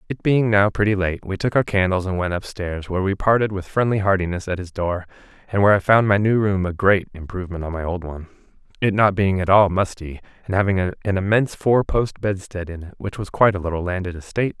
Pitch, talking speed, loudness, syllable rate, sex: 95 Hz, 235 wpm, -20 LUFS, 6.2 syllables/s, male